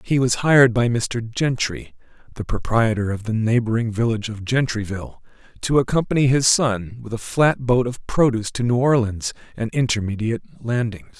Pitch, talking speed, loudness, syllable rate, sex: 120 Hz, 160 wpm, -20 LUFS, 5.3 syllables/s, male